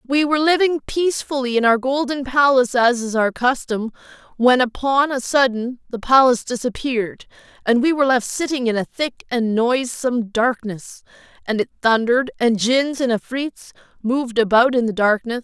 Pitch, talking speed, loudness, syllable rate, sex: 250 Hz, 165 wpm, -18 LUFS, 5.2 syllables/s, female